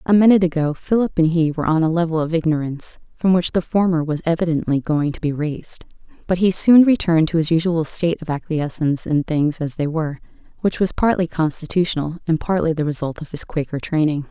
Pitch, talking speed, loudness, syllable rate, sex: 165 Hz, 205 wpm, -19 LUFS, 6.1 syllables/s, female